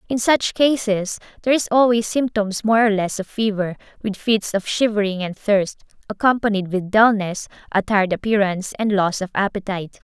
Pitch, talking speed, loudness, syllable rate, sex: 210 Hz, 165 wpm, -20 LUFS, 5.3 syllables/s, female